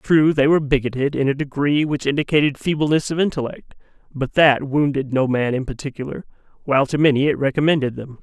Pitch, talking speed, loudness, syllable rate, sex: 140 Hz, 180 wpm, -19 LUFS, 6.0 syllables/s, male